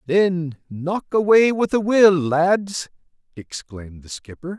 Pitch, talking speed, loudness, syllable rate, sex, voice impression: 175 Hz, 130 wpm, -18 LUFS, 3.7 syllables/s, male, masculine, adult-like, cool, slightly intellectual, slightly calm, slightly elegant